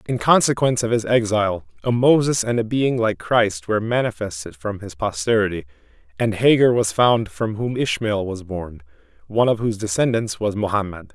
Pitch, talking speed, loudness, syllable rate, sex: 115 Hz, 170 wpm, -20 LUFS, 5.4 syllables/s, male